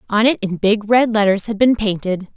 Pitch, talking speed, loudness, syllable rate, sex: 210 Hz, 230 wpm, -16 LUFS, 5.2 syllables/s, female